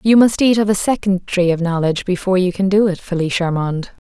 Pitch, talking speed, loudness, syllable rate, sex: 190 Hz, 235 wpm, -16 LUFS, 6.2 syllables/s, female